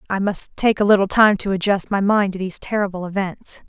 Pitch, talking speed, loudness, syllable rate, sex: 195 Hz, 230 wpm, -19 LUFS, 5.7 syllables/s, female